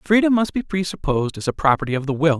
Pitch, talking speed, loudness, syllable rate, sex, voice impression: 165 Hz, 250 wpm, -20 LUFS, 6.8 syllables/s, male, very masculine, middle-aged, thick, slightly tensed, powerful, bright, slightly soft, clear, fluent, slightly raspy, cool, very intellectual, slightly refreshing, very sincere, very calm, mature, friendly, reassuring, unique, slightly elegant, wild, slightly sweet, lively, kind, slightly sharp